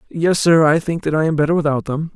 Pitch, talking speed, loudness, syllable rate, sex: 160 Hz, 280 wpm, -16 LUFS, 6.1 syllables/s, male